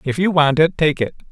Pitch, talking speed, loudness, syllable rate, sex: 155 Hz, 275 wpm, -16 LUFS, 5.6 syllables/s, male